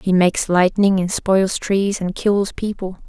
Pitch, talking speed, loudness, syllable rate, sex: 190 Hz, 175 wpm, -18 LUFS, 4.0 syllables/s, female